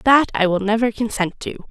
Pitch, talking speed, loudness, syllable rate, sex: 220 Hz, 210 wpm, -19 LUFS, 5.4 syllables/s, female